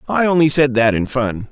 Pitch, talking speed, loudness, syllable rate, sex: 135 Hz, 240 wpm, -15 LUFS, 5.3 syllables/s, male